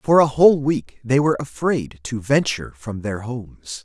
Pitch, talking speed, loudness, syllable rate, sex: 125 Hz, 190 wpm, -20 LUFS, 4.9 syllables/s, male